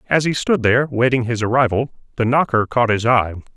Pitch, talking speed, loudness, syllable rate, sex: 120 Hz, 200 wpm, -17 LUFS, 5.8 syllables/s, male